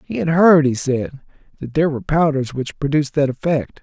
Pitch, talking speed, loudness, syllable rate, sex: 140 Hz, 205 wpm, -18 LUFS, 5.6 syllables/s, male